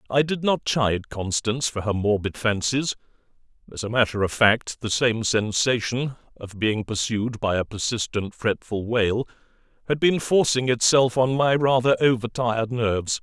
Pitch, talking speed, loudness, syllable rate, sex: 115 Hz, 160 wpm, -23 LUFS, 4.7 syllables/s, male